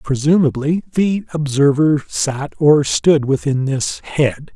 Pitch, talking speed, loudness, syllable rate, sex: 145 Hz, 120 wpm, -16 LUFS, 3.5 syllables/s, male